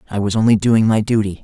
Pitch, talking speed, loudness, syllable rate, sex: 105 Hz, 250 wpm, -15 LUFS, 6.6 syllables/s, male